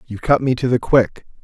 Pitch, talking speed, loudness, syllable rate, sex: 125 Hz, 250 wpm, -17 LUFS, 5.2 syllables/s, male